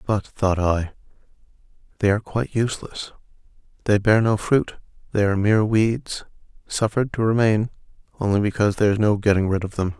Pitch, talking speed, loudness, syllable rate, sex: 105 Hz, 160 wpm, -21 LUFS, 6.1 syllables/s, male